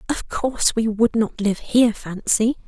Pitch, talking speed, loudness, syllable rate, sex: 225 Hz, 180 wpm, -20 LUFS, 4.6 syllables/s, female